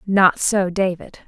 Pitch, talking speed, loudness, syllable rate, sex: 185 Hz, 140 wpm, -18 LUFS, 3.5 syllables/s, female